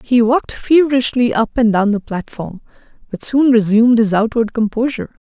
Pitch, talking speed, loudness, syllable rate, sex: 235 Hz, 160 wpm, -15 LUFS, 5.5 syllables/s, female